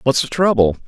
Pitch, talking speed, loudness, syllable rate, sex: 130 Hz, 205 wpm, -16 LUFS, 5.6 syllables/s, male